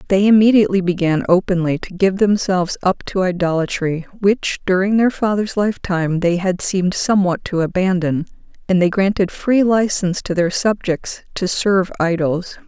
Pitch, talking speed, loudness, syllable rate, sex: 185 Hz, 150 wpm, -17 LUFS, 5.2 syllables/s, female